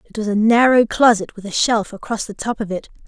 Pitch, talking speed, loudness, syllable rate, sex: 220 Hz, 255 wpm, -17 LUFS, 5.9 syllables/s, female